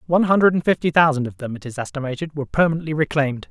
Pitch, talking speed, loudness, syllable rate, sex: 150 Hz, 225 wpm, -20 LUFS, 7.8 syllables/s, male